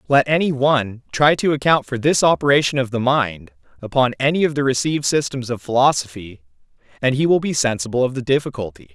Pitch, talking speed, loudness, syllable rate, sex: 130 Hz, 190 wpm, -18 LUFS, 6.0 syllables/s, male